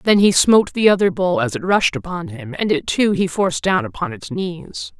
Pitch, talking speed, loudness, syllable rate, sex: 195 Hz, 240 wpm, -17 LUFS, 5.2 syllables/s, female